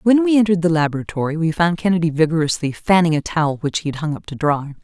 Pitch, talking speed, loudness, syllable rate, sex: 165 Hz, 235 wpm, -18 LUFS, 6.9 syllables/s, female